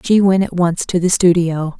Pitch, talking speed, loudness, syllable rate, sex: 175 Hz, 235 wpm, -15 LUFS, 4.8 syllables/s, female